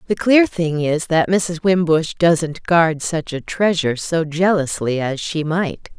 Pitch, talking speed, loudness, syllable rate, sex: 165 Hz, 170 wpm, -18 LUFS, 3.9 syllables/s, female